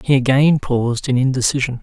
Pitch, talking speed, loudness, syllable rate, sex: 130 Hz, 165 wpm, -16 LUFS, 5.8 syllables/s, male